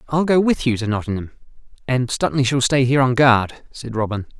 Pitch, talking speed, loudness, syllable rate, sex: 130 Hz, 190 wpm, -18 LUFS, 6.0 syllables/s, male